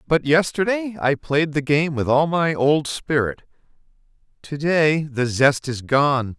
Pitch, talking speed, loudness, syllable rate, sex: 150 Hz, 160 wpm, -20 LUFS, 3.8 syllables/s, male